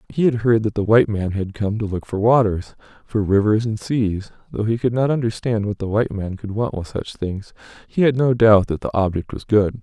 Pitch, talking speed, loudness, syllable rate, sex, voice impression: 110 Hz, 245 wpm, -20 LUFS, 5.4 syllables/s, male, masculine, adult-like, slightly relaxed, slightly powerful, soft, muffled, intellectual, calm, friendly, reassuring, slightly lively, kind, slightly modest